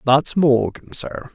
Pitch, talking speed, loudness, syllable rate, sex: 135 Hz, 135 wpm, -19 LUFS, 3.3 syllables/s, male